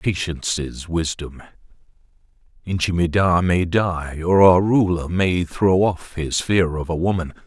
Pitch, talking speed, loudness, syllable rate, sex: 85 Hz, 145 wpm, -19 LUFS, 4.1 syllables/s, male